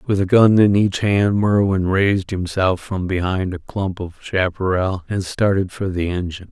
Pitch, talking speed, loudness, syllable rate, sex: 95 Hz, 185 wpm, -18 LUFS, 4.5 syllables/s, male